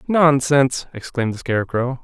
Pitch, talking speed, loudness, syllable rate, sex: 135 Hz, 120 wpm, -19 LUFS, 5.5 syllables/s, male